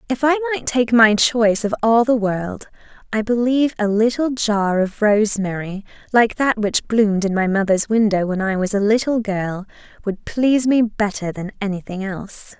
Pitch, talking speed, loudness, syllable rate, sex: 215 Hz, 180 wpm, -18 LUFS, 5.0 syllables/s, female